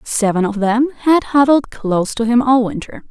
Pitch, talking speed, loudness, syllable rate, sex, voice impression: 240 Hz, 195 wpm, -15 LUFS, 4.7 syllables/s, female, feminine, adult-like, slightly relaxed, slightly powerful, bright, slightly halting, intellectual, friendly, unique, lively, sharp, light